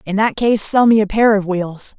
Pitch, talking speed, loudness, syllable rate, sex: 210 Hz, 275 wpm, -14 LUFS, 4.6 syllables/s, female